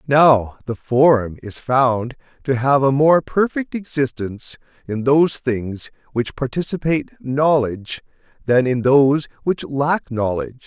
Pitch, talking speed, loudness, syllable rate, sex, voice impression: 135 Hz, 130 wpm, -18 LUFS, 4.2 syllables/s, male, very masculine, very adult-like, middle-aged, thick, slightly tensed, powerful, bright, soft, slightly clear, fluent, cool, very intellectual, refreshing, very sincere, very calm, mature, very friendly, very reassuring, unique, very elegant, slightly wild, sweet, very lively, kind, slightly light